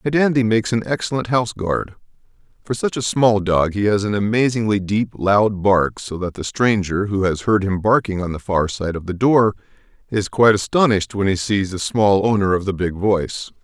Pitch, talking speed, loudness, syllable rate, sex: 105 Hz, 210 wpm, -18 LUFS, 5.3 syllables/s, male